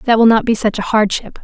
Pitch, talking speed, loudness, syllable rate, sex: 215 Hz, 295 wpm, -14 LUFS, 5.8 syllables/s, female